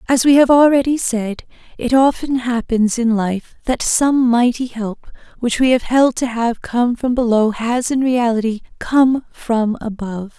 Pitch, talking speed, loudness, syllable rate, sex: 240 Hz, 165 wpm, -16 LUFS, 4.2 syllables/s, female